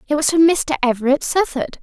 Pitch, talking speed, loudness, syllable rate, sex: 290 Hz, 195 wpm, -17 LUFS, 5.7 syllables/s, female